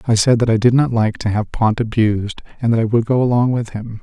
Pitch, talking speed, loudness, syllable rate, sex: 115 Hz, 285 wpm, -17 LUFS, 6.0 syllables/s, male